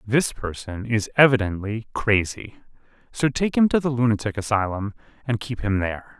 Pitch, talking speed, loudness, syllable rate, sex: 115 Hz, 155 wpm, -23 LUFS, 5.1 syllables/s, male